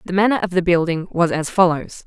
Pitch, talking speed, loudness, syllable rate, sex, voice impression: 175 Hz, 235 wpm, -18 LUFS, 6.0 syllables/s, female, feminine, adult-like, tensed, slightly powerful, clear, slightly halting, intellectual, calm, friendly, lively